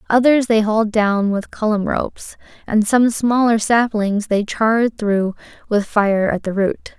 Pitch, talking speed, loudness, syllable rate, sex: 215 Hz, 165 wpm, -17 LUFS, 4.2 syllables/s, female